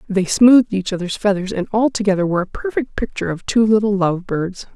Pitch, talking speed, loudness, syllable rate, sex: 200 Hz, 190 wpm, -17 LUFS, 6.3 syllables/s, female